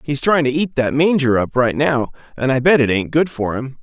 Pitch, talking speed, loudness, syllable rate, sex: 135 Hz, 265 wpm, -17 LUFS, 5.2 syllables/s, male